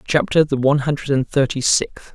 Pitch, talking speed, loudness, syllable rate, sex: 140 Hz, 195 wpm, -18 LUFS, 5.5 syllables/s, male